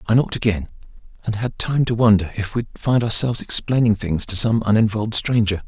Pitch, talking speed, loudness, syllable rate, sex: 110 Hz, 190 wpm, -19 LUFS, 6.0 syllables/s, male